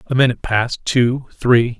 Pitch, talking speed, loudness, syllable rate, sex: 120 Hz, 100 wpm, -17 LUFS, 4.9 syllables/s, male